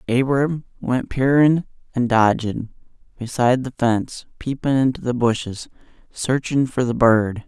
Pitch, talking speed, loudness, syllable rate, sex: 125 Hz, 130 wpm, -20 LUFS, 4.5 syllables/s, male